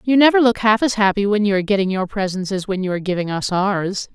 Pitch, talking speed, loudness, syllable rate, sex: 200 Hz, 275 wpm, -18 LUFS, 6.5 syllables/s, female